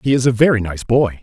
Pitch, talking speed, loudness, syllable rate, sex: 120 Hz, 295 wpm, -16 LUFS, 5.9 syllables/s, male